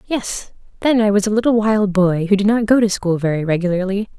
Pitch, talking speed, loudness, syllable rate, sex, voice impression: 205 Hz, 230 wpm, -17 LUFS, 5.7 syllables/s, female, feminine, slightly adult-like, fluent, slightly intellectual, slightly reassuring